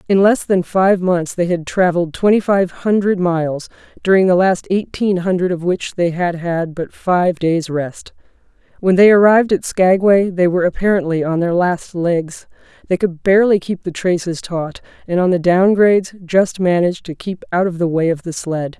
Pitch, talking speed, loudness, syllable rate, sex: 180 Hz, 195 wpm, -16 LUFS, 4.9 syllables/s, female